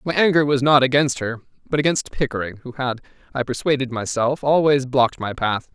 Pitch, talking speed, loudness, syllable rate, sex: 130 Hz, 190 wpm, -20 LUFS, 5.6 syllables/s, male